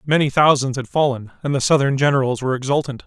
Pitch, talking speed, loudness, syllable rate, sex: 135 Hz, 195 wpm, -18 LUFS, 6.7 syllables/s, male